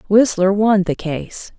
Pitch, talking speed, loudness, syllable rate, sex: 195 Hz, 150 wpm, -17 LUFS, 3.6 syllables/s, female